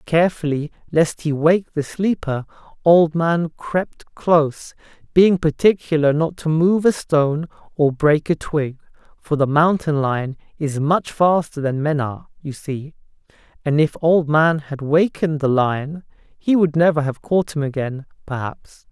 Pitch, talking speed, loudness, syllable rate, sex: 155 Hz, 155 wpm, -19 LUFS, 4.2 syllables/s, male